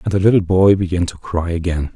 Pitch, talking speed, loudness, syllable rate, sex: 90 Hz, 245 wpm, -16 LUFS, 6.0 syllables/s, male